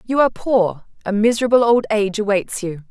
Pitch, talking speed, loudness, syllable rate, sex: 215 Hz, 185 wpm, -18 LUFS, 5.8 syllables/s, female